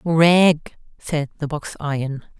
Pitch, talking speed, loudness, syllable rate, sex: 155 Hz, 125 wpm, -20 LUFS, 3.4 syllables/s, female